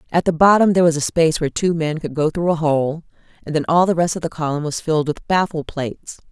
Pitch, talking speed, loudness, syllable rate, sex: 160 Hz, 265 wpm, -18 LUFS, 6.5 syllables/s, female